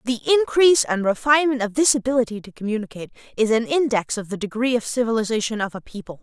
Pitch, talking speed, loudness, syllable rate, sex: 235 Hz, 195 wpm, -20 LUFS, 6.8 syllables/s, female